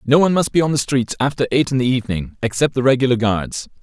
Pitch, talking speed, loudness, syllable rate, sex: 130 Hz, 250 wpm, -18 LUFS, 6.6 syllables/s, male